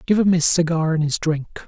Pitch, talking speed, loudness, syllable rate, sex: 165 Hz, 250 wpm, -19 LUFS, 5.2 syllables/s, male